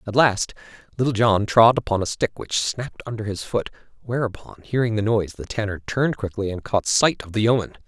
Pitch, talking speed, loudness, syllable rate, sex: 110 Hz, 205 wpm, -22 LUFS, 5.9 syllables/s, male